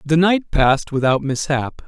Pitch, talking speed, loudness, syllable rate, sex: 150 Hz, 160 wpm, -18 LUFS, 4.6 syllables/s, male